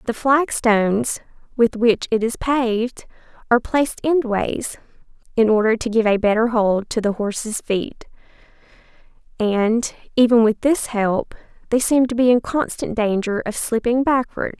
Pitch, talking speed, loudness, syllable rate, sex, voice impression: 230 Hz, 155 wpm, -19 LUFS, 4.5 syllables/s, female, feminine, slightly adult-like, slightly soft, cute, friendly, slightly sweet, kind